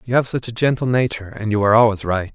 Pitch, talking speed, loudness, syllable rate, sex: 110 Hz, 280 wpm, -18 LUFS, 7.2 syllables/s, male